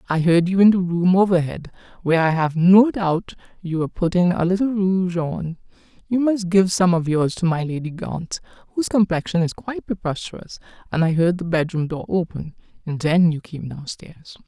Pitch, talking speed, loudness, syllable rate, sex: 175 Hz, 180 wpm, -20 LUFS, 5.3 syllables/s, female